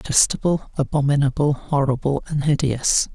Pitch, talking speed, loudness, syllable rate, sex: 145 Hz, 95 wpm, -20 LUFS, 5.1 syllables/s, male